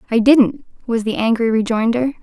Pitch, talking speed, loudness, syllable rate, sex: 235 Hz, 160 wpm, -16 LUFS, 5.2 syllables/s, female